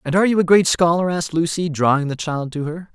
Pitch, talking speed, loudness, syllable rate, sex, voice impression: 165 Hz, 265 wpm, -18 LUFS, 6.3 syllables/s, male, masculine, adult-like, tensed, bright, clear, fluent, cool, refreshing, calm, friendly, reassuring, wild, lively, slightly kind, modest